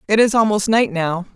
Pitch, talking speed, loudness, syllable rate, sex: 205 Hz, 220 wpm, -17 LUFS, 5.2 syllables/s, female